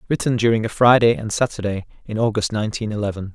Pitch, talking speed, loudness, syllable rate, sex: 110 Hz, 180 wpm, -19 LUFS, 6.7 syllables/s, male